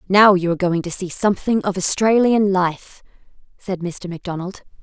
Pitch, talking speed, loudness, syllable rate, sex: 190 Hz, 160 wpm, -18 LUFS, 5.3 syllables/s, female